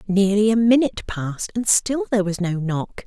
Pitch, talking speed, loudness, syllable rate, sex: 205 Hz, 195 wpm, -20 LUFS, 5.4 syllables/s, female